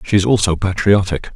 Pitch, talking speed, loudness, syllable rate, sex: 95 Hz, 175 wpm, -16 LUFS, 5.6 syllables/s, male